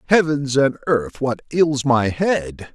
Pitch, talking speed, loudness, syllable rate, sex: 135 Hz, 155 wpm, -19 LUFS, 3.5 syllables/s, male